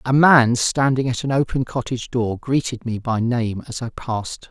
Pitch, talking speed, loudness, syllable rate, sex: 120 Hz, 200 wpm, -20 LUFS, 4.8 syllables/s, male